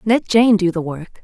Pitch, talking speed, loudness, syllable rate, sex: 200 Hz, 245 wpm, -16 LUFS, 4.5 syllables/s, female